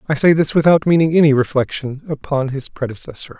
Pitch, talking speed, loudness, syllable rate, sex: 145 Hz, 175 wpm, -16 LUFS, 6.0 syllables/s, male